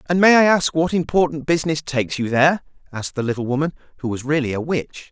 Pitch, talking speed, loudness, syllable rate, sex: 150 Hz, 225 wpm, -19 LUFS, 6.7 syllables/s, male